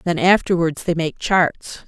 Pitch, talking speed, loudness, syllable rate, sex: 170 Hz, 160 wpm, -18 LUFS, 4.1 syllables/s, female